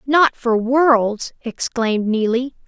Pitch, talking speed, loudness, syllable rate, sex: 245 Hz, 110 wpm, -18 LUFS, 3.4 syllables/s, female